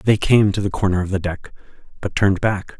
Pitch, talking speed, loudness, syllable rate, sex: 100 Hz, 235 wpm, -19 LUFS, 5.7 syllables/s, male